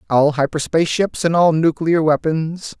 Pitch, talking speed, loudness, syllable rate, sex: 155 Hz, 150 wpm, -17 LUFS, 4.7 syllables/s, male